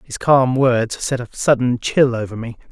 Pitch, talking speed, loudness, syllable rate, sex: 125 Hz, 200 wpm, -17 LUFS, 4.5 syllables/s, male